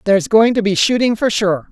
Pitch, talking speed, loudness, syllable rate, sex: 210 Hz, 245 wpm, -14 LUFS, 5.7 syllables/s, female